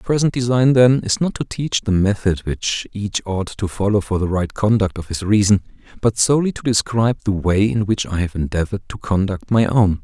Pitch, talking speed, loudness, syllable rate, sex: 105 Hz, 220 wpm, -18 LUFS, 5.5 syllables/s, male